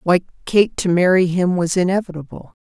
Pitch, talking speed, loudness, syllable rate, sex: 180 Hz, 160 wpm, -17 LUFS, 5.4 syllables/s, female